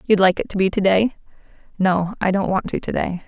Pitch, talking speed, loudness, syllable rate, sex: 195 Hz, 255 wpm, -20 LUFS, 5.6 syllables/s, female